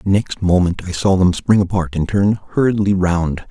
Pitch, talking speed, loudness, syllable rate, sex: 95 Hz, 190 wpm, -16 LUFS, 4.4 syllables/s, male